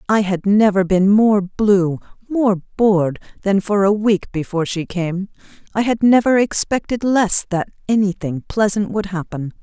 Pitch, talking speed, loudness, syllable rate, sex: 200 Hz, 155 wpm, -17 LUFS, 4.4 syllables/s, female